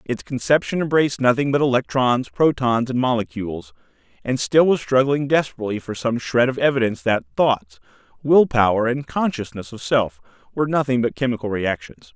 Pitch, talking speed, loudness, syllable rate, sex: 125 Hz, 160 wpm, -20 LUFS, 5.5 syllables/s, male